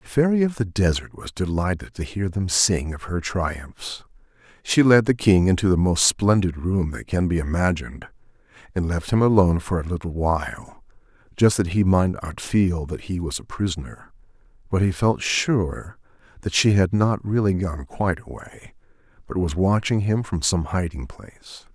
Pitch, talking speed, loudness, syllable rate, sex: 95 Hz, 180 wpm, -22 LUFS, 4.9 syllables/s, male